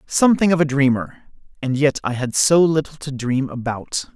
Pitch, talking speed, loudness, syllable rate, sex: 145 Hz, 190 wpm, -19 LUFS, 5.0 syllables/s, male